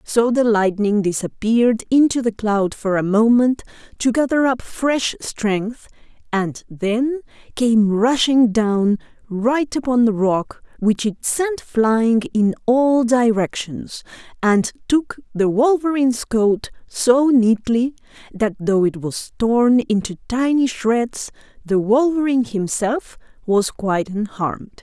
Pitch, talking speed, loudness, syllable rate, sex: 230 Hz, 125 wpm, -18 LUFS, 3.7 syllables/s, female